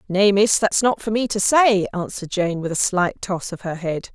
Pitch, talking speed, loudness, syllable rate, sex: 195 Hz, 245 wpm, -20 LUFS, 4.9 syllables/s, female